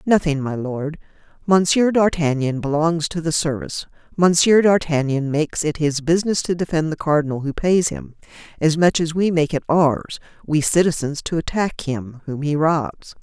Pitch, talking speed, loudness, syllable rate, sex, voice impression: 160 Hz, 170 wpm, -19 LUFS, 5.0 syllables/s, female, very feminine, adult-like, slightly middle-aged, slightly thin, tensed, slightly powerful, slightly bright, slightly soft, slightly clear, fluent, cool, very intellectual, refreshing, sincere, calm, friendly, reassuring, slightly unique, slightly elegant, wild, slightly sweet, lively, slightly strict, slightly intense, slightly sharp